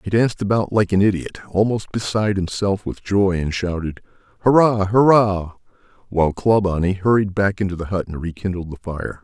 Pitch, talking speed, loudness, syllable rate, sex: 95 Hz, 170 wpm, -19 LUFS, 5.6 syllables/s, male